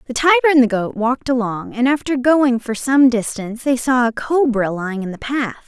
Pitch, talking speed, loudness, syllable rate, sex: 250 Hz, 220 wpm, -17 LUFS, 5.6 syllables/s, female